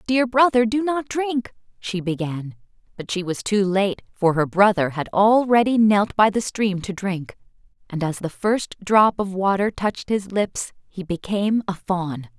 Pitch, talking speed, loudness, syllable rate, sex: 200 Hz, 180 wpm, -21 LUFS, 4.3 syllables/s, female